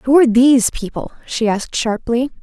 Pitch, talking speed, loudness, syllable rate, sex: 240 Hz, 175 wpm, -16 LUFS, 5.6 syllables/s, female